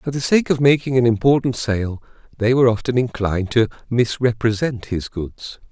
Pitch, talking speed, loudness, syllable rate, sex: 120 Hz, 170 wpm, -19 LUFS, 5.2 syllables/s, male